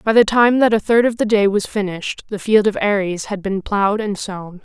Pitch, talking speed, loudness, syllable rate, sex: 205 Hz, 260 wpm, -17 LUFS, 5.2 syllables/s, female